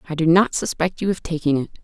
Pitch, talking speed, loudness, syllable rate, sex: 165 Hz, 260 wpm, -20 LUFS, 6.5 syllables/s, female